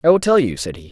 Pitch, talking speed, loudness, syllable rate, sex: 135 Hz, 390 wpm, -16 LUFS, 7.4 syllables/s, male